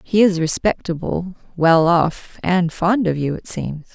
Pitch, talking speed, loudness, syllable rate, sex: 175 Hz, 165 wpm, -19 LUFS, 3.9 syllables/s, female